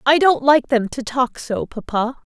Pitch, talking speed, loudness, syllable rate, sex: 250 Hz, 205 wpm, -19 LUFS, 4.2 syllables/s, female